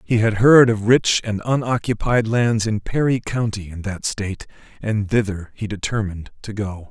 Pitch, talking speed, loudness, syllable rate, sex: 110 Hz, 175 wpm, -19 LUFS, 4.8 syllables/s, male